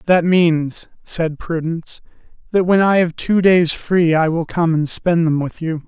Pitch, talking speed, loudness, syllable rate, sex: 170 Hz, 195 wpm, -17 LUFS, 4.1 syllables/s, male